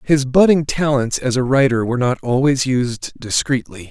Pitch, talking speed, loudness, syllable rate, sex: 130 Hz, 170 wpm, -17 LUFS, 4.8 syllables/s, male